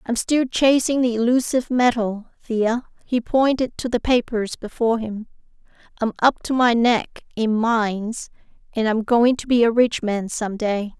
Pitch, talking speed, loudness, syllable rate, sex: 235 Hz, 160 wpm, -20 LUFS, 4.5 syllables/s, female